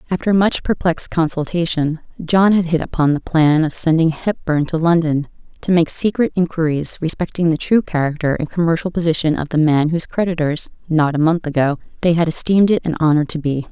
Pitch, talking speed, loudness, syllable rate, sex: 165 Hz, 190 wpm, -17 LUFS, 5.7 syllables/s, female